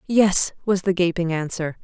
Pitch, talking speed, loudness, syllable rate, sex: 180 Hz, 165 wpm, -21 LUFS, 4.4 syllables/s, female